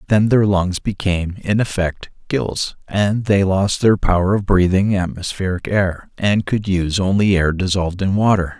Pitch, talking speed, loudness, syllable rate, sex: 95 Hz, 170 wpm, -18 LUFS, 4.6 syllables/s, male